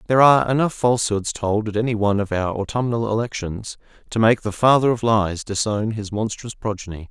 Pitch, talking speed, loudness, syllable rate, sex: 110 Hz, 185 wpm, -20 LUFS, 5.8 syllables/s, male